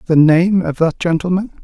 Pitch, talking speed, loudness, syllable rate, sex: 170 Hz, 185 wpm, -14 LUFS, 4.9 syllables/s, male